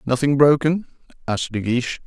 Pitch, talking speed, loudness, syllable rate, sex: 135 Hz, 145 wpm, -19 LUFS, 5.9 syllables/s, male